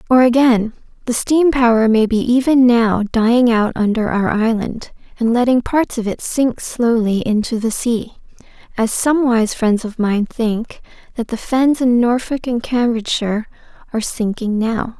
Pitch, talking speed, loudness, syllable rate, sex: 235 Hz, 165 wpm, -16 LUFS, 4.5 syllables/s, female